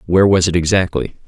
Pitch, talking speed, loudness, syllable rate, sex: 90 Hz, 190 wpm, -15 LUFS, 6.7 syllables/s, male